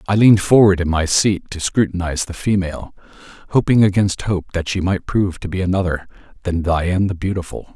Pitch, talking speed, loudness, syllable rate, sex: 95 Hz, 180 wpm, -18 LUFS, 6.0 syllables/s, male